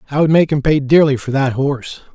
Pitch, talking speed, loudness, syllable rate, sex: 140 Hz, 250 wpm, -15 LUFS, 6.1 syllables/s, male